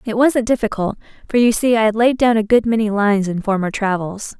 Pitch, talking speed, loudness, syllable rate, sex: 220 Hz, 230 wpm, -17 LUFS, 5.8 syllables/s, female